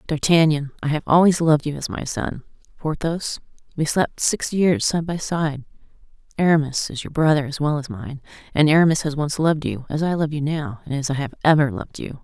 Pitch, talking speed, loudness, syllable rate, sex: 150 Hz, 210 wpm, -21 LUFS, 5.6 syllables/s, female